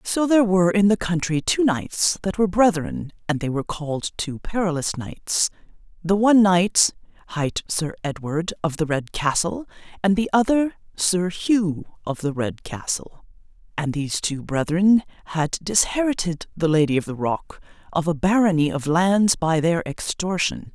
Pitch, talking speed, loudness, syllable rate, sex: 175 Hz, 160 wpm, -22 LUFS, 4.7 syllables/s, female